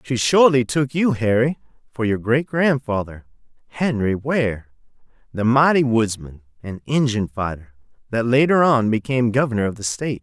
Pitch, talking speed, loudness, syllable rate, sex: 120 Hz, 145 wpm, -19 LUFS, 5.0 syllables/s, male